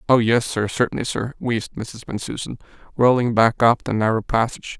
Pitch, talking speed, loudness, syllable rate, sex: 115 Hz, 165 wpm, -20 LUFS, 5.5 syllables/s, male